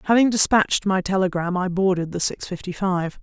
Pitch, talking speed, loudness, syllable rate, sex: 190 Hz, 185 wpm, -21 LUFS, 5.6 syllables/s, female